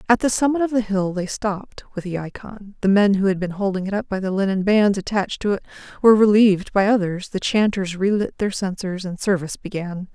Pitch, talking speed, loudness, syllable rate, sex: 200 Hz, 225 wpm, -20 LUFS, 5.9 syllables/s, female